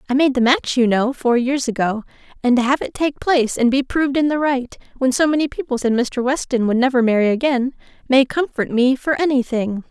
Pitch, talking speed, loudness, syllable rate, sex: 260 Hz, 230 wpm, -18 LUFS, 5.6 syllables/s, female